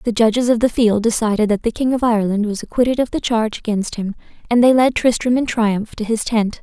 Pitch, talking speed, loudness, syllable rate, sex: 225 Hz, 245 wpm, -17 LUFS, 6.0 syllables/s, female